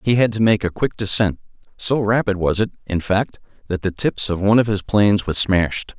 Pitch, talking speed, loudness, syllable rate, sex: 100 Hz, 220 wpm, -19 LUFS, 5.5 syllables/s, male